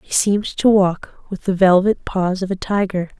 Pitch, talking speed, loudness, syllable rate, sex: 190 Hz, 205 wpm, -17 LUFS, 4.7 syllables/s, female